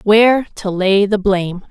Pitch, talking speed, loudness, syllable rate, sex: 200 Hz, 175 wpm, -15 LUFS, 4.6 syllables/s, female